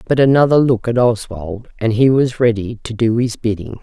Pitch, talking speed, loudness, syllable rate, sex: 115 Hz, 205 wpm, -15 LUFS, 5.1 syllables/s, female